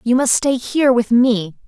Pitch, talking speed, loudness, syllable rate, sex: 245 Hz, 180 wpm, -16 LUFS, 4.7 syllables/s, female